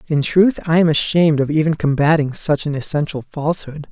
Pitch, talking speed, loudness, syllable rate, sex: 155 Hz, 185 wpm, -17 LUFS, 5.7 syllables/s, male